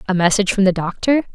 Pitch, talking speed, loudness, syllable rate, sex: 200 Hz, 225 wpm, -17 LUFS, 7.3 syllables/s, female